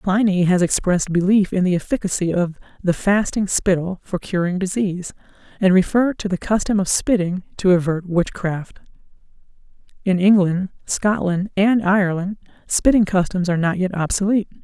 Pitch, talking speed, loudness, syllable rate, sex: 190 Hz, 145 wpm, -19 LUFS, 5.3 syllables/s, female